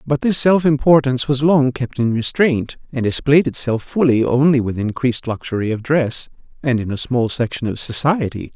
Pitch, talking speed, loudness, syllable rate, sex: 130 Hz, 180 wpm, -17 LUFS, 5.1 syllables/s, male